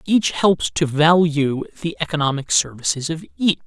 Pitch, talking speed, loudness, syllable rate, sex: 155 Hz, 145 wpm, -19 LUFS, 4.8 syllables/s, male